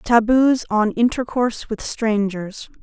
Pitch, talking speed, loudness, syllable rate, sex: 225 Hz, 105 wpm, -19 LUFS, 3.9 syllables/s, female